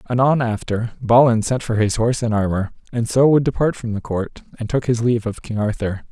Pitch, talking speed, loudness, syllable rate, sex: 115 Hz, 225 wpm, -19 LUFS, 5.7 syllables/s, male